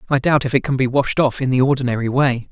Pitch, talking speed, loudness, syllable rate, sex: 130 Hz, 285 wpm, -18 LUFS, 6.5 syllables/s, male